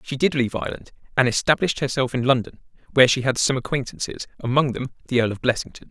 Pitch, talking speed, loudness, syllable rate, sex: 130 Hz, 205 wpm, -22 LUFS, 6.9 syllables/s, male